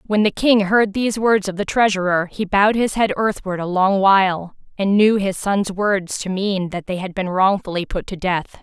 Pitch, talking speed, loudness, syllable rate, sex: 195 Hz, 225 wpm, -18 LUFS, 4.9 syllables/s, female